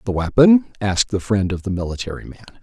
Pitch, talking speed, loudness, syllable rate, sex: 105 Hz, 205 wpm, -18 LUFS, 6.5 syllables/s, male